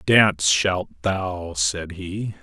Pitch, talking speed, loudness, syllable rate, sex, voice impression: 90 Hz, 125 wpm, -22 LUFS, 2.9 syllables/s, male, very masculine, middle-aged, slightly thick, slightly muffled, slightly intellectual, slightly calm